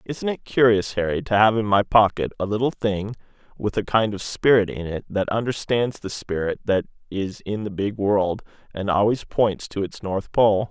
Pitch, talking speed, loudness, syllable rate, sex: 105 Hz, 200 wpm, -22 LUFS, 4.8 syllables/s, male